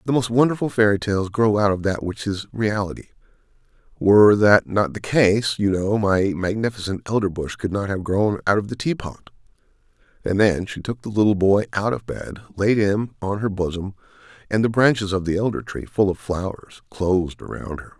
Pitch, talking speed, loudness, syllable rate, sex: 105 Hz, 195 wpm, -21 LUFS, 5.2 syllables/s, male